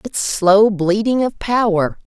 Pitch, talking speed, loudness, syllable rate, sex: 205 Hz, 140 wpm, -16 LUFS, 3.7 syllables/s, female